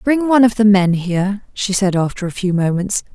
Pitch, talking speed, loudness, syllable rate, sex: 200 Hz, 230 wpm, -16 LUFS, 5.5 syllables/s, female